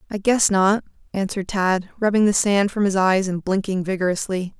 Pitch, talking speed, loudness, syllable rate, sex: 195 Hz, 185 wpm, -20 LUFS, 5.3 syllables/s, female